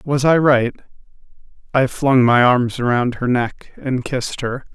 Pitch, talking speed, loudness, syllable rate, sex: 125 Hz, 165 wpm, -17 LUFS, 4.2 syllables/s, male